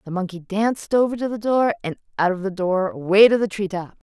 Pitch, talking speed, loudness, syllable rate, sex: 200 Hz, 250 wpm, -21 LUFS, 5.9 syllables/s, female